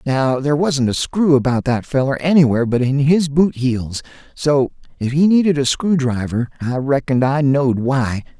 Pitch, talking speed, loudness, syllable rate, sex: 140 Hz, 180 wpm, -17 LUFS, 5.0 syllables/s, male